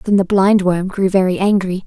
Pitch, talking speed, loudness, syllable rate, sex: 190 Hz, 195 wpm, -15 LUFS, 4.9 syllables/s, female